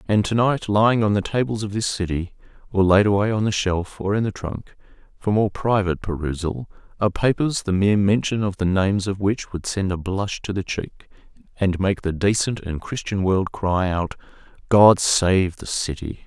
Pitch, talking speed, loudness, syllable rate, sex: 100 Hz, 200 wpm, -21 LUFS, 5.0 syllables/s, male